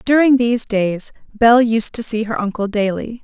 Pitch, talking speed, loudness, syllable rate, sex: 225 Hz, 185 wpm, -16 LUFS, 4.8 syllables/s, female